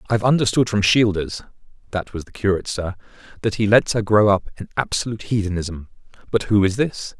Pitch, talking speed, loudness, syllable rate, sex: 105 Hz, 185 wpm, -20 LUFS, 5.3 syllables/s, male